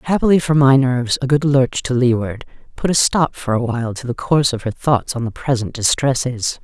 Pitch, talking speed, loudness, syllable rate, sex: 130 Hz, 225 wpm, -17 LUFS, 5.6 syllables/s, female